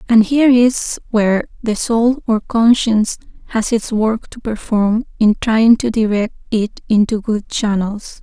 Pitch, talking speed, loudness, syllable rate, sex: 225 Hz, 155 wpm, -16 LUFS, 4.1 syllables/s, female